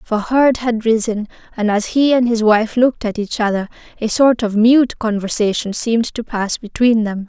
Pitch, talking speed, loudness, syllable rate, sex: 225 Hz, 200 wpm, -16 LUFS, 4.9 syllables/s, female